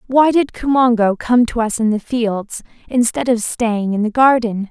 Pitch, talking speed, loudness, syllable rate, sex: 235 Hz, 190 wpm, -16 LUFS, 4.4 syllables/s, female